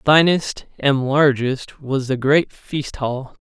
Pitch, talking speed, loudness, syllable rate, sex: 140 Hz, 160 wpm, -19 LUFS, 3.5 syllables/s, male